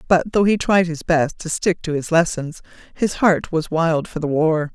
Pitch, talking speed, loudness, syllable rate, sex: 165 Hz, 225 wpm, -19 LUFS, 4.5 syllables/s, female